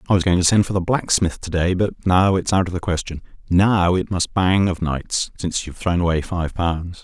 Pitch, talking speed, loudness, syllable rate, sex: 90 Hz, 245 wpm, -19 LUFS, 5.2 syllables/s, male